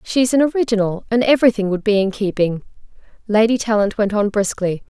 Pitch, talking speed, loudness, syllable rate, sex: 215 Hz, 170 wpm, -17 LUFS, 5.9 syllables/s, female